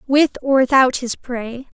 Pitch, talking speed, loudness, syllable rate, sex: 255 Hz, 170 wpm, -17 LUFS, 4.0 syllables/s, female